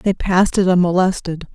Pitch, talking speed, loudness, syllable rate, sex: 185 Hz, 155 wpm, -16 LUFS, 5.5 syllables/s, female